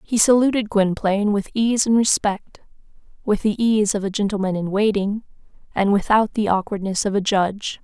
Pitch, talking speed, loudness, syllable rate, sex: 205 Hz, 160 wpm, -20 LUFS, 5.2 syllables/s, female